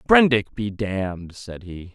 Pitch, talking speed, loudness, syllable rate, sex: 105 Hz, 155 wpm, -21 LUFS, 3.9 syllables/s, male